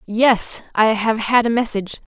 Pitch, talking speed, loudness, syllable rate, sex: 225 Hz, 170 wpm, -18 LUFS, 4.5 syllables/s, female